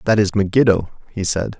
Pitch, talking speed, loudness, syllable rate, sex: 105 Hz, 190 wpm, -18 LUFS, 5.6 syllables/s, male